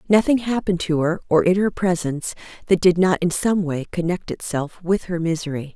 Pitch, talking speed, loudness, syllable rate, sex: 175 Hz, 200 wpm, -21 LUFS, 5.5 syllables/s, female